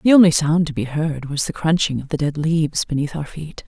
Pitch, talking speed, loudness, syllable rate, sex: 155 Hz, 260 wpm, -19 LUFS, 5.6 syllables/s, female